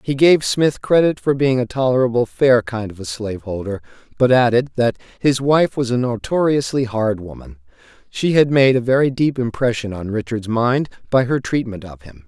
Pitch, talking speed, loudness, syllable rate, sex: 120 Hz, 190 wpm, -18 LUFS, 5.1 syllables/s, male